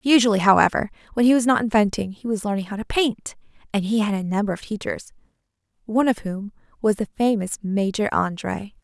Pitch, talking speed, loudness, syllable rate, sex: 215 Hz, 190 wpm, -22 LUFS, 5.9 syllables/s, female